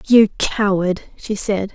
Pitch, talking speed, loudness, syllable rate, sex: 200 Hz, 140 wpm, -18 LUFS, 3.6 syllables/s, female